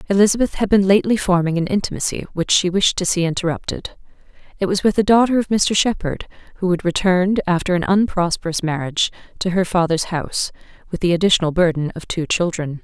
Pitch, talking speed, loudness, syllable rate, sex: 180 Hz, 180 wpm, -18 LUFS, 6.2 syllables/s, female